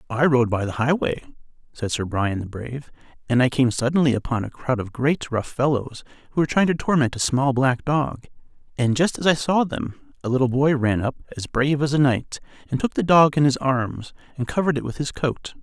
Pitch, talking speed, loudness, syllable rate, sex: 135 Hz, 225 wpm, -22 LUFS, 5.6 syllables/s, male